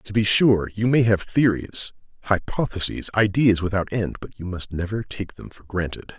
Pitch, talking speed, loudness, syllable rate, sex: 100 Hz, 185 wpm, -22 LUFS, 4.8 syllables/s, male